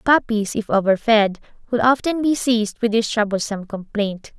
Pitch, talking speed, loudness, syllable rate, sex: 220 Hz, 150 wpm, -19 LUFS, 5.1 syllables/s, female